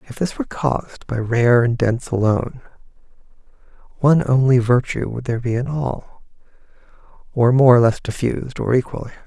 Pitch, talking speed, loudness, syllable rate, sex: 125 Hz, 155 wpm, -18 LUFS, 5.7 syllables/s, male